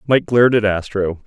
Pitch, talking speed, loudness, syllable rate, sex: 105 Hz, 190 wpm, -16 LUFS, 5.4 syllables/s, male